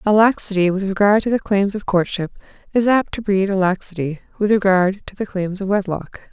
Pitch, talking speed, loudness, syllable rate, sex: 195 Hz, 210 wpm, -18 LUFS, 5.4 syllables/s, female